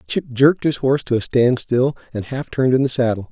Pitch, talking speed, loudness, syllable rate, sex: 125 Hz, 255 wpm, -18 LUFS, 6.0 syllables/s, male